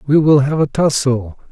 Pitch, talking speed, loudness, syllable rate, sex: 140 Hz, 200 wpm, -15 LUFS, 4.7 syllables/s, male